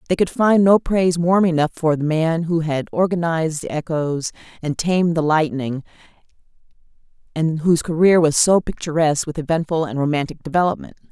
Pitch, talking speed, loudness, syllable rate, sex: 160 Hz, 160 wpm, -19 LUFS, 5.6 syllables/s, female